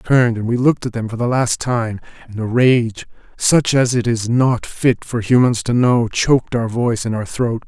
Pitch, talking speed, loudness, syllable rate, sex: 120 Hz, 235 wpm, -17 LUFS, 5.4 syllables/s, male